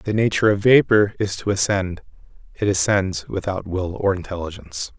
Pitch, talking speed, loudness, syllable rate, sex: 100 Hz, 155 wpm, -20 LUFS, 5.2 syllables/s, male